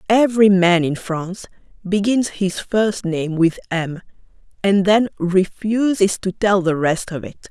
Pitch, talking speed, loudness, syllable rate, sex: 190 Hz, 150 wpm, -18 LUFS, 4.1 syllables/s, female